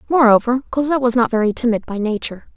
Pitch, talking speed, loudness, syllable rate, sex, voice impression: 240 Hz, 190 wpm, -17 LUFS, 7.1 syllables/s, female, very feminine, young, very thin, very tensed, powerful, very bright, hard, clear, fluent, slightly raspy, very cute, intellectual, very refreshing, sincere, calm, very friendly, very reassuring, very unique, very elegant, very sweet, lively, strict, slightly intense